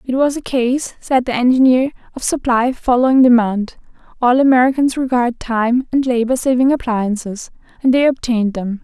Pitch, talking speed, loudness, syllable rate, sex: 250 Hz, 150 wpm, -15 LUFS, 5.2 syllables/s, female